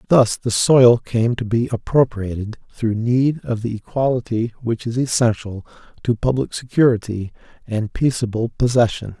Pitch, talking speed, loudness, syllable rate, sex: 115 Hz, 135 wpm, -19 LUFS, 4.6 syllables/s, male